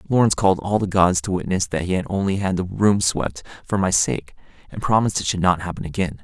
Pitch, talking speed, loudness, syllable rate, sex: 95 Hz, 240 wpm, -21 LUFS, 6.2 syllables/s, male